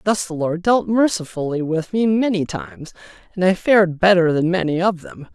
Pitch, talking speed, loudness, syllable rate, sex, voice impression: 180 Hz, 190 wpm, -18 LUFS, 5.2 syllables/s, male, masculine, adult-like, tensed, slightly hard, clear, fluent, intellectual, friendly, slightly light